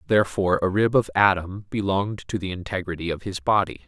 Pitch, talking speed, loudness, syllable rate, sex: 95 Hz, 185 wpm, -23 LUFS, 6.2 syllables/s, male